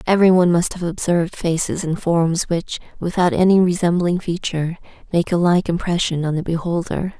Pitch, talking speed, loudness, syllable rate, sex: 175 Hz, 165 wpm, -19 LUFS, 5.6 syllables/s, female